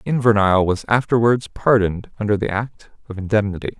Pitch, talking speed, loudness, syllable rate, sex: 105 Hz, 140 wpm, -18 LUFS, 6.1 syllables/s, male